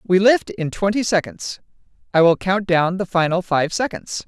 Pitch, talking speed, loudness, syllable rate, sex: 190 Hz, 180 wpm, -19 LUFS, 4.7 syllables/s, female